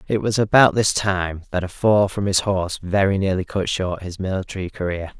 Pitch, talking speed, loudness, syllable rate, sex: 95 Hz, 210 wpm, -20 LUFS, 5.3 syllables/s, male